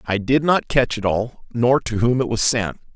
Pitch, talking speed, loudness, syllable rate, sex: 120 Hz, 245 wpm, -19 LUFS, 4.6 syllables/s, male